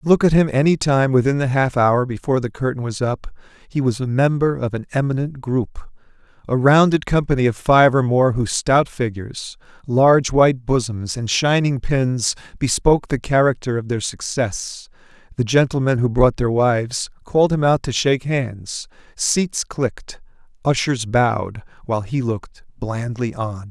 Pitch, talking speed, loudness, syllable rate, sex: 130 Hz, 160 wpm, -19 LUFS, 4.8 syllables/s, male